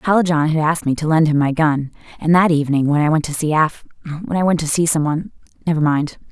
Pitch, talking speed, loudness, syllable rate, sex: 155 Hz, 245 wpm, -17 LUFS, 6.9 syllables/s, female